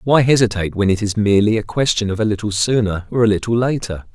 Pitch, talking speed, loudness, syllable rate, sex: 105 Hz, 230 wpm, -17 LUFS, 6.6 syllables/s, male